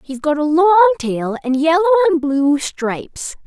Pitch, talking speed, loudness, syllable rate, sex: 315 Hz, 175 wpm, -15 LUFS, 4.4 syllables/s, female